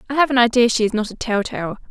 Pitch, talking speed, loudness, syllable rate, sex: 235 Hz, 285 wpm, -18 LUFS, 7.4 syllables/s, female